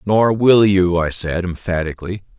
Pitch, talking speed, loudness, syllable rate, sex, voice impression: 95 Hz, 150 wpm, -16 LUFS, 4.7 syllables/s, male, very masculine, very adult-like, middle-aged, very thick, tensed, powerful, slightly bright, slightly soft, slightly clear, fluent, slightly raspy, very cool, very intellectual, slightly refreshing, very sincere, very calm, very mature, very friendly, very reassuring, unique, elegant, wild, sweet, slightly lively, slightly strict, slightly intense, slightly modest